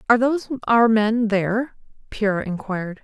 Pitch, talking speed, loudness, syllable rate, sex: 220 Hz, 140 wpm, -20 LUFS, 5.6 syllables/s, female